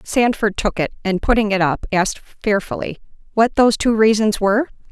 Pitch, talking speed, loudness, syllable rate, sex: 210 Hz, 170 wpm, -18 LUFS, 5.6 syllables/s, female